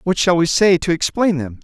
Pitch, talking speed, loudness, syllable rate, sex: 170 Hz, 255 wpm, -16 LUFS, 5.3 syllables/s, male